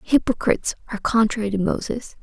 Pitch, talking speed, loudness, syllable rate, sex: 220 Hz, 135 wpm, -22 LUFS, 6.1 syllables/s, female